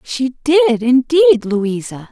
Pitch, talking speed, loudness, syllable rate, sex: 265 Hz, 115 wpm, -14 LUFS, 3.0 syllables/s, female